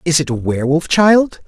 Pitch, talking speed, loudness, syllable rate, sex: 160 Hz, 205 wpm, -14 LUFS, 5.3 syllables/s, male